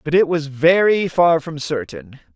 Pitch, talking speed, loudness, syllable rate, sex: 160 Hz, 180 wpm, -17 LUFS, 4.2 syllables/s, male